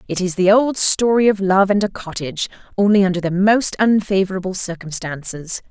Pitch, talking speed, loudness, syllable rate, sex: 195 Hz, 160 wpm, -17 LUFS, 5.4 syllables/s, female